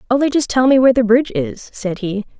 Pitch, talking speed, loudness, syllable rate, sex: 235 Hz, 250 wpm, -16 LUFS, 6.5 syllables/s, female